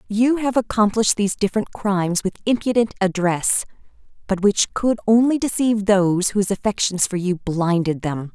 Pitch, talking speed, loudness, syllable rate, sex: 205 Hz, 150 wpm, -20 LUFS, 5.4 syllables/s, female